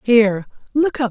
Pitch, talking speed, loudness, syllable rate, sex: 235 Hz, 165 wpm, -18 LUFS, 4.9 syllables/s, female